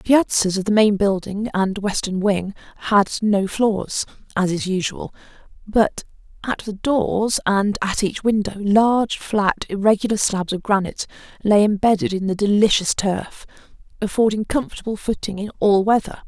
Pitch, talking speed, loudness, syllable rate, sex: 205 Hz, 150 wpm, -20 LUFS, 4.7 syllables/s, female